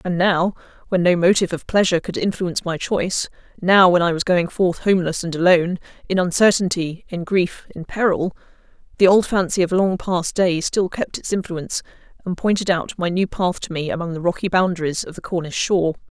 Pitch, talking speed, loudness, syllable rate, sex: 180 Hz, 190 wpm, -19 LUFS, 5.7 syllables/s, female